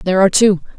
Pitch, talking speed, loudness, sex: 195 Hz, 230 wpm, -13 LUFS, female